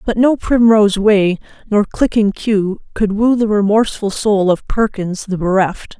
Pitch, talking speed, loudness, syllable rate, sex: 210 Hz, 160 wpm, -15 LUFS, 4.4 syllables/s, female